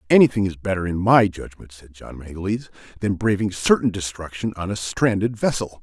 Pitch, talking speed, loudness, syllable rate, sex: 100 Hz, 175 wpm, -21 LUFS, 5.3 syllables/s, male